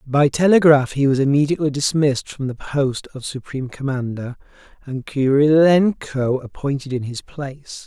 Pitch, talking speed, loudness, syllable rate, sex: 140 Hz, 135 wpm, -19 LUFS, 4.8 syllables/s, male